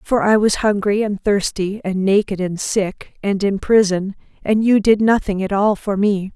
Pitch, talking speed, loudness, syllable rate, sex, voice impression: 200 Hz, 200 wpm, -17 LUFS, 4.4 syllables/s, female, feminine, adult-like, slightly tensed, slightly powerful, bright, slightly soft, raspy, calm, friendly, reassuring, elegant, slightly lively, kind